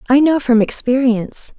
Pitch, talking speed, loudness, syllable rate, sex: 250 Hz, 150 wpm, -14 LUFS, 5.1 syllables/s, female